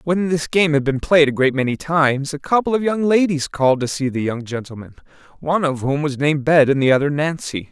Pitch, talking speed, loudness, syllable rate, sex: 150 Hz, 240 wpm, -18 LUFS, 5.9 syllables/s, male